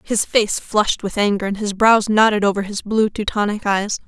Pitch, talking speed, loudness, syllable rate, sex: 210 Hz, 205 wpm, -18 LUFS, 5.1 syllables/s, female